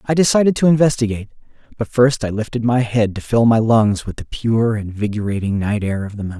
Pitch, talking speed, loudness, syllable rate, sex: 115 Hz, 215 wpm, -17 LUFS, 6.0 syllables/s, male